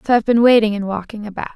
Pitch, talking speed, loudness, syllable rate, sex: 215 Hz, 270 wpm, -16 LUFS, 8.1 syllables/s, female